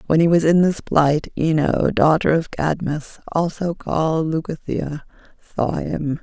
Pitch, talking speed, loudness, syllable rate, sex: 160 Hz, 145 wpm, -20 LUFS, 4.0 syllables/s, female